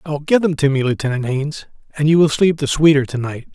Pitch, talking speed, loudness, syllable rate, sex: 145 Hz, 255 wpm, -17 LUFS, 6.2 syllables/s, male